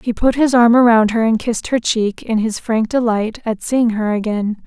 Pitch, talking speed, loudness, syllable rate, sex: 225 Hz, 230 wpm, -16 LUFS, 4.8 syllables/s, female